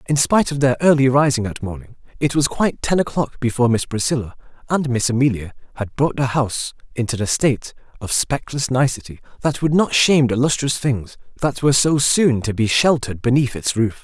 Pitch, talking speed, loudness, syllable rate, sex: 130 Hz, 195 wpm, -18 LUFS, 5.8 syllables/s, male